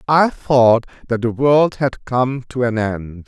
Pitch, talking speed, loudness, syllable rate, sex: 125 Hz, 185 wpm, -17 LUFS, 3.6 syllables/s, male